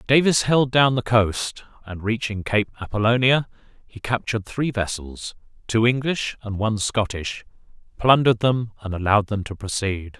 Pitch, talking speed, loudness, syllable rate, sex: 110 Hz, 145 wpm, -21 LUFS, 4.9 syllables/s, male